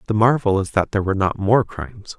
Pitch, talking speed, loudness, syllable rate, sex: 105 Hz, 245 wpm, -19 LUFS, 6.5 syllables/s, male